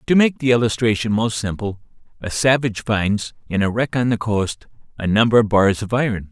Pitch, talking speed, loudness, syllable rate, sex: 110 Hz, 200 wpm, -19 LUFS, 5.4 syllables/s, male